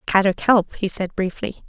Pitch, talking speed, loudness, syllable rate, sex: 200 Hz, 180 wpm, -20 LUFS, 4.9 syllables/s, female